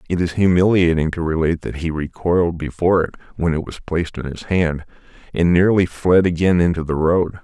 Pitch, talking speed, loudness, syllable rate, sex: 85 Hz, 195 wpm, -18 LUFS, 5.7 syllables/s, male